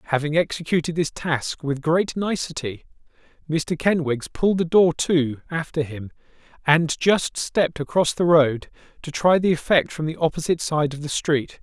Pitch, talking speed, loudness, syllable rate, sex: 160 Hz, 165 wpm, -22 LUFS, 4.8 syllables/s, male